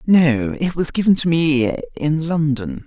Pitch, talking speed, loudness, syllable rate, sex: 150 Hz, 165 wpm, -18 LUFS, 4.0 syllables/s, male